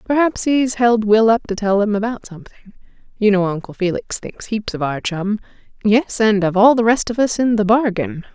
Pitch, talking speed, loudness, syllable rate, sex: 215 Hz, 215 wpm, -17 LUFS, 5.2 syllables/s, female